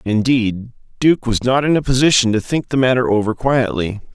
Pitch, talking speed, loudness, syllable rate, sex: 120 Hz, 190 wpm, -16 LUFS, 5.2 syllables/s, male